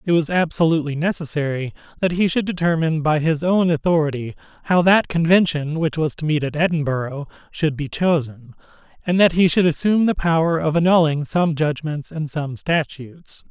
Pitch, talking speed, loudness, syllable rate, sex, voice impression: 160 Hz, 170 wpm, -19 LUFS, 5.3 syllables/s, male, masculine, very adult-like, middle-aged, slightly thick, slightly tensed, slightly weak, bright, slightly soft, clear, slightly fluent, slightly cool, very intellectual, refreshing, very sincere, slightly calm, slightly friendly, slightly reassuring, very unique, slightly wild, lively, slightly kind, slightly modest